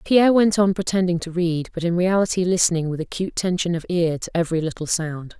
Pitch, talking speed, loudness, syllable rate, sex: 175 Hz, 210 wpm, -21 LUFS, 6.2 syllables/s, female